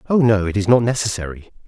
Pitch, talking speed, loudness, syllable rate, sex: 110 Hz, 215 wpm, -18 LUFS, 6.8 syllables/s, male